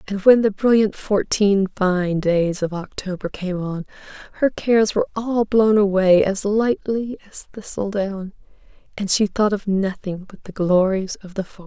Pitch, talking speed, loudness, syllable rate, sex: 200 Hz, 165 wpm, -20 LUFS, 4.5 syllables/s, female